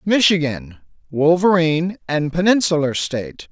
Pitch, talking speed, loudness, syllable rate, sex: 170 Hz, 85 wpm, -17 LUFS, 4.6 syllables/s, male